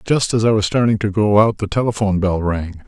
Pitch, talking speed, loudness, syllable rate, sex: 105 Hz, 250 wpm, -17 LUFS, 5.8 syllables/s, male